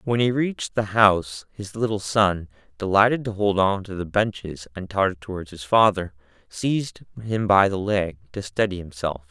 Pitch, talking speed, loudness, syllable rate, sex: 100 Hz, 180 wpm, -22 LUFS, 4.9 syllables/s, male